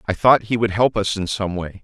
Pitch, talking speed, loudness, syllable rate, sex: 100 Hz, 295 wpm, -19 LUFS, 5.4 syllables/s, male